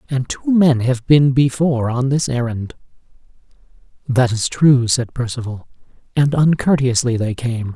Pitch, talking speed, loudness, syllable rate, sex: 130 Hz, 140 wpm, -17 LUFS, 4.5 syllables/s, male